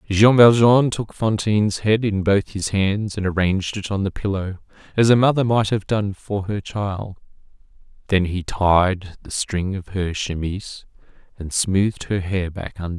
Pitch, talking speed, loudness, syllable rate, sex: 100 Hz, 185 wpm, -20 LUFS, 4.7 syllables/s, male